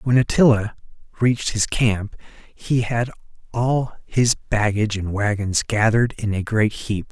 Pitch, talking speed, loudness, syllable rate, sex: 110 Hz, 145 wpm, -20 LUFS, 4.3 syllables/s, male